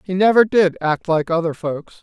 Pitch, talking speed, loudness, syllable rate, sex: 175 Hz, 205 wpm, -17 LUFS, 4.8 syllables/s, male